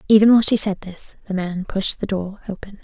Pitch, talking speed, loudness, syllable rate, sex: 200 Hz, 230 wpm, -19 LUFS, 6.0 syllables/s, female